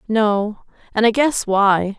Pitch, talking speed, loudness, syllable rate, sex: 215 Hz, 150 wpm, -18 LUFS, 3.2 syllables/s, female